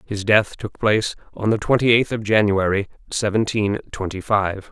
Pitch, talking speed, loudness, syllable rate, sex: 105 Hz, 165 wpm, -20 LUFS, 4.9 syllables/s, male